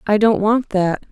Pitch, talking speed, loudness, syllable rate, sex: 210 Hz, 215 wpm, -17 LUFS, 4.3 syllables/s, female